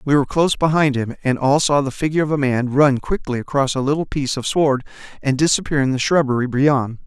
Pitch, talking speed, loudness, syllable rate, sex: 140 Hz, 230 wpm, -18 LUFS, 6.2 syllables/s, male